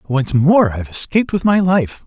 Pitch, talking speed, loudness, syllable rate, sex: 160 Hz, 235 wpm, -15 LUFS, 5.2 syllables/s, male